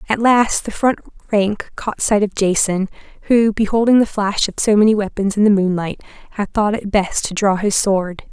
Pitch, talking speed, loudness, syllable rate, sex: 205 Hz, 200 wpm, -17 LUFS, 4.9 syllables/s, female